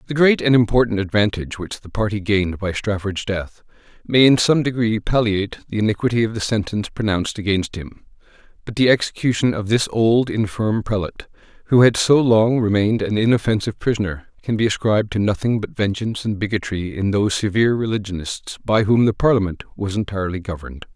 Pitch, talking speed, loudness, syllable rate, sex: 105 Hz, 175 wpm, -19 LUFS, 6.0 syllables/s, male